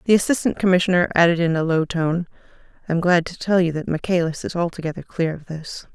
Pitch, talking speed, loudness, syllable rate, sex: 170 Hz, 210 wpm, -20 LUFS, 6.3 syllables/s, female